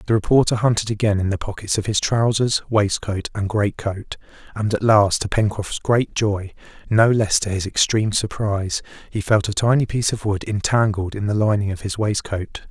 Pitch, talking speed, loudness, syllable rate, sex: 105 Hz, 195 wpm, -20 LUFS, 5.2 syllables/s, male